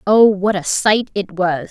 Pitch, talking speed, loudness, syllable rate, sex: 195 Hz, 210 wpm, -16 LUFS, 4.1 syllables/s, female